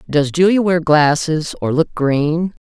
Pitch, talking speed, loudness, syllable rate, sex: 160 Hz, 160 wpm, -15 LUFS, 3.8 syllables/s, female